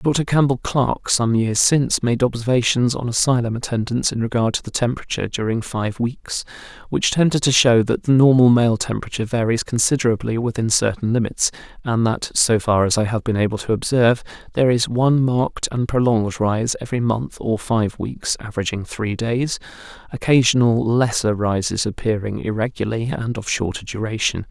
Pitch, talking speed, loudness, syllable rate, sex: 115 Hz, 165 wpm, -19 LUFS, 5.5 syllables/s, male